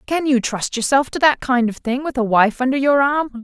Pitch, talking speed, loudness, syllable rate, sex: 255 Hz, 260 wpm, -17 LUFS, 5.2 syllables/s, female